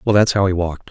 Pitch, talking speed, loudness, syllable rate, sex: 95 Hz, 330 wpm, -17 LUFS, 7.6 syllables/s, male